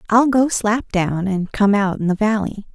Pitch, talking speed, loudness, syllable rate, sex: 210 Hz, 220 wpm, -18 LUFS, 4.4 syllables/s, female